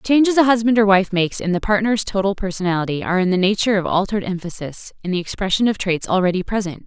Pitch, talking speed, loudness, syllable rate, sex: 195 Hz, 225 wpm, -18 LUFS, 7.0 syllables/s, female